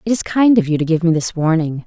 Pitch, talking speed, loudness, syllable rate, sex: 175 Hz, 320 wpm, -16 LUFS, 6.3 syllables/s, female